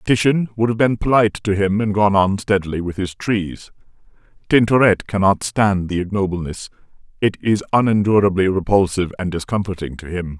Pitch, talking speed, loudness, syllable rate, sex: 100 Hz, 155 wpm, -18 LUFS, 5.4 syllables/s, male